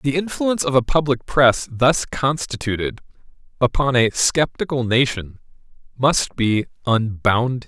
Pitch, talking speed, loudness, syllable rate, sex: 130 Hz, 115 wpm, -19 LUFS, 4.3 syllables/s, male